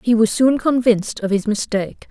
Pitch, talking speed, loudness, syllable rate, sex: 225 Hz, 200 wpm, -18 LUFS, 5.5 syllables/s, female